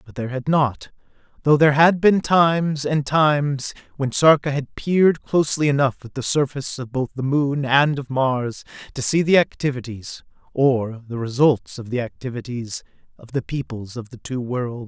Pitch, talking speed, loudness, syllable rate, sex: 135 Hz, 180 wpm, -20 LUFS, 4.9 syllables/s, male